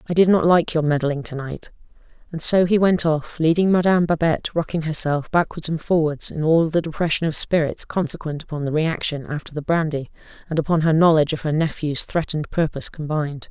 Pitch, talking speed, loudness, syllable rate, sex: 160 Hz, 195 wpm, -20 LUFS, 5.8 syllables/s, female